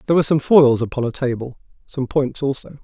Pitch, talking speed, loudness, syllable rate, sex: 135 Hz, 190 wpm, -18 LUFS, 6.3 syllables/s, male